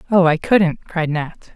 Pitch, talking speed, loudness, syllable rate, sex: 170 Hz, 195 wpm, -17 LUFS, 3.8 syllables/s, female